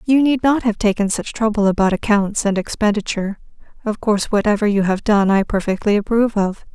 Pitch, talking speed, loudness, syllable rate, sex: 210 Hz, 185 wpm, -18 LUFS, 5.9 syllables/s, female